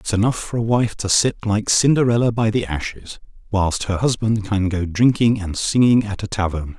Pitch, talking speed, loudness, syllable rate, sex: 105 Hz, 205 wpm, -19 LUFS, 5.0 syllables/s, male